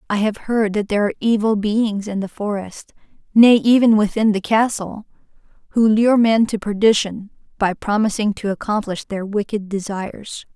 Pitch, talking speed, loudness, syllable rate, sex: 210 Hz, 150 wpm, -18 LUFS, 5.0 syllables/s, female